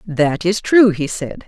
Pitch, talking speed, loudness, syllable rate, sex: 180 Hz, 205 wpm, -16 LUFS, 3.7 syllables/s, female